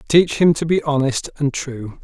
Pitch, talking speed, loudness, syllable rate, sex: 145 Hz, 205 wpm, -18 LUFS, 4.4 syllables/s, male